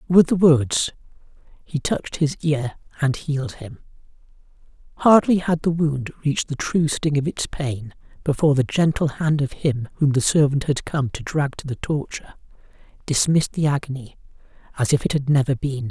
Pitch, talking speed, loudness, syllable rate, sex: 145 Hz, 175 wpm, -21 LUFS, 5.2 syllables/s, male